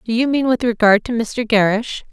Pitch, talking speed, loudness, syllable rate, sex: 230 Hz, 225 wpm, -17 LUFS, 5.1 syllables/s, female